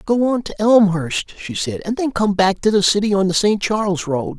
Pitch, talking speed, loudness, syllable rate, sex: 195 Hz, 245 wpm, -17 LUFS, 5.0 syllables/s, male